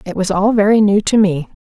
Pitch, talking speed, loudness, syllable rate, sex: 200 Hz, 260 wpm, -13 LUFS, 5.7 syllables/s, female